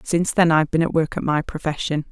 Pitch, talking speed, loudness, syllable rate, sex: 160 Hz, 255 wpm, -20 LUFS, 6.5 syllables/s, female